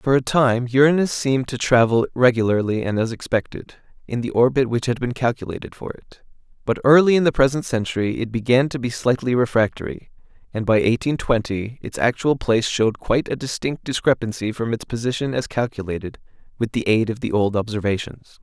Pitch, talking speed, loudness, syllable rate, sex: 120 Hz, 180 wpm, -20 LUFS, 5.8 syllables/s, male